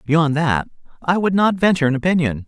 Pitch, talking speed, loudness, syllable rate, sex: 160 Hz, 195 wpm, -18 LUFS, 5.9 syllables/s, male